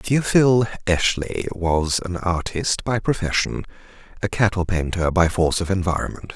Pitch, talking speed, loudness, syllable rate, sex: 95 Hz, 130 wpm, -21 LUFS, 4.6 syllables/s, male